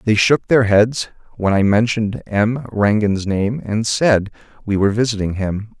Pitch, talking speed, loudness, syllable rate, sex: 110 Hz, 165 wpm, -17 LUFS, 4.5 syllables/s, male